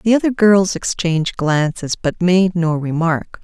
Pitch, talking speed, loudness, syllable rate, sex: 175 Hz, 155 wpm, -16 LUFS, 4.3 syllables/s, female